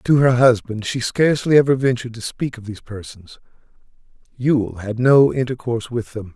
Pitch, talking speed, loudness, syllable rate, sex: 120 Hz, 170 wpm, -18 LUFS, 5.4 syllables/s, male